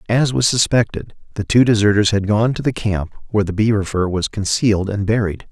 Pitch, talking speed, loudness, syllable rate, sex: 105 Hz, 205 wpm, -17 LUFS, 5.7 syllables/s, male